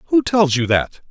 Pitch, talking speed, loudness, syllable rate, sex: 170 Hz, 215 wpm, -17 LUFS, 4.0 syllables/s, male